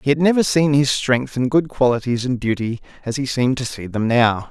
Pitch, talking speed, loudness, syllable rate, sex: 130 Hz, 240 wpm, -19 LUFS, 5.6 syllables/s, male